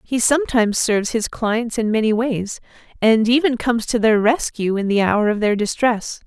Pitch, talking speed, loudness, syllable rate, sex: 225 Hz, 190 wpm, -18 LUFS, 5.3 syllables/s, female